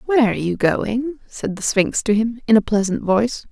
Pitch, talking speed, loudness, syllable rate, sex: 225 Hz, 220 wpm, -19 LUFS, 5.3 syllables/s, female